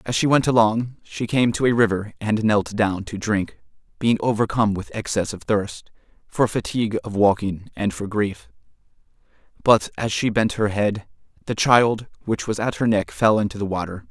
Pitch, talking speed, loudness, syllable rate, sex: 105 Hz, 185 wpm, -21 LUFS, 4.9 syllables/s, male